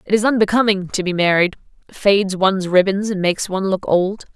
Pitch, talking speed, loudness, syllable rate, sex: 195 Hz, 180 wpm, -17 LUFS, 6.0 syllables/s, female